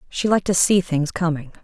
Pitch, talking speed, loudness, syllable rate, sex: 170 Hz, 220 wpm, -19 LUFS, 5.8 syllables/s, female